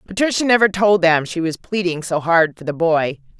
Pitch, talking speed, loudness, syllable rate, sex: 175 Hz, 210 wpm, -17 LUFS, 5.1 syllables/s, female